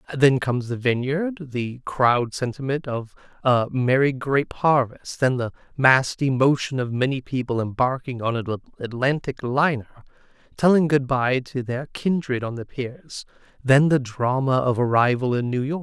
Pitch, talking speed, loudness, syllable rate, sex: 130 Hz, 155 wpm, -22 LUFS, 4.5 syllables/s, male